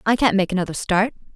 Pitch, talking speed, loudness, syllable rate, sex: 200 Hz, 220 wpm, -20 LUFS, 6.7 syllables/s, female